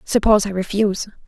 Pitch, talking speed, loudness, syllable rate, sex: 205 Hz, 140 wpm, -19 LUFS, 6.8 syllables/s, female